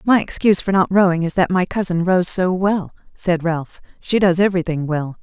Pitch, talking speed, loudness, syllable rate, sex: 180 Hz, 205 wpm, -17 LUFS, 5.3 syllables/s, female